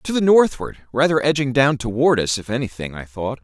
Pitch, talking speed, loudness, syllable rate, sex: 130 Hz, 210 wpm, -18 LUFS, 5.5 syllables/s, male